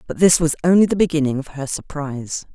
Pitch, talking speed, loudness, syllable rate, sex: 155 Hz, 215 wpm, -19 LUFS, 6.2 syllables/s, female